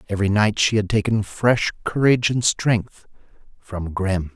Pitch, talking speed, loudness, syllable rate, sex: 105 Hz, 150 wpm, -20 LUFS, 4.5 syllables/s, male